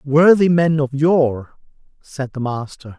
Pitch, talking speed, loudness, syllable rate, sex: 145 Hz, 140 wpm, -16 LUFS, 3.7 syllables/s, male